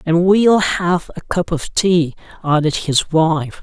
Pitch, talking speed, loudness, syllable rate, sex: 170 Hz, 165 wpm, -16 LUFS, 3.5 syllables/s, male